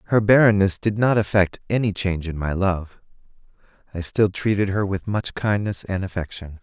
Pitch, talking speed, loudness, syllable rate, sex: 95 Hz, 170 wpm, -21 LUFS, 5.2 syllables/s, male